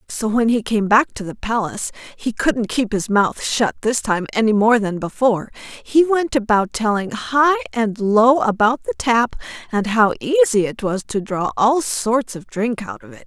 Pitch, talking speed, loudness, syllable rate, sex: 225 Hz, 200 wpm, -18 LUFS, 4.5 syllables/s, female